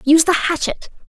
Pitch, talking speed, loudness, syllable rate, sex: 320 Hz, 165 wpm, -17 LUFS, 6.0 syllables/s, female